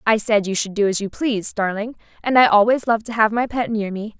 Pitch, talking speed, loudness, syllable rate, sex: 220 Hz, 270 wpm, -19 LUFS, 5.8 syllables/s, female